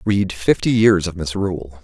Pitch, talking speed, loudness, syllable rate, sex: 90 Hz, 165 wpm, -18 LUFS, 4.7 syllables/s, male